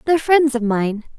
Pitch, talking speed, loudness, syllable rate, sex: 260 Hz, 200 wpm, -17 LUFS, 5.4 syllables/s, female